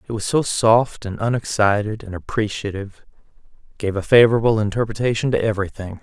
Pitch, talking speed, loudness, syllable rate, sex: 105 Hz, 130 wpm, -19 LUFS, 6.0 syllables/s, male